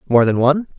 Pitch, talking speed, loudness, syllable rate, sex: 140 Hz, 230 wpm, -15 LUFS, 7.6 syllables/s, male